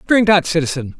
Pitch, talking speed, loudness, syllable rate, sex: 170 Hz, 180 wpm, -15 LUFS, 5.9 syllables/s, male